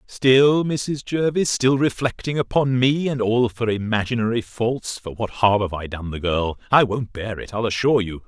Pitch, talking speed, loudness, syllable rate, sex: 115 Hz, 190 wpm, -21 LUFS, 4.6 syllables/s, male